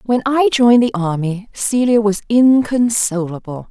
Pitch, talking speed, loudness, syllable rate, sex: 220 Hz, 130 wpm, -15 LUFS, 4.3 syllables/s, female